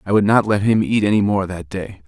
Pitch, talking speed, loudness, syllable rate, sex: 100 Hz, 290 wpm, -17 LUFS, 5.7 syllables/s, male